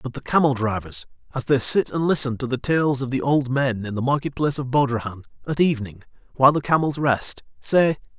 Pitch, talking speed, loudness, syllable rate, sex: 135 Hz, 210 wpm, -21 LUFS, 5.8 syllables/s, male